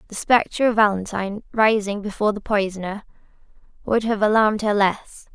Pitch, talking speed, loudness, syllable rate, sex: 210 Hz, 145 wpm, -20 LUFS, 5.7 syllables/s, female